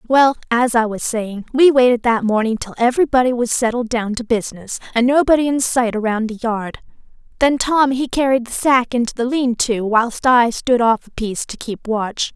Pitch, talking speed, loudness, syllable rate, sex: 240 Hz, 205 wpm, -17 LUFS, 5.1 syllables/s, female